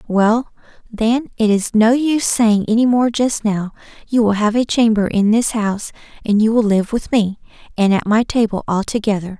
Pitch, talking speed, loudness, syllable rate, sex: 220 Hz, 190 wpm, -16 LUFS, 5.0 syllables/s, female